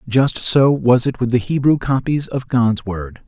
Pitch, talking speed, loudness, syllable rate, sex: 125 Hz, 200 wpm, -17 LUFS, 4.2 syllables/s, male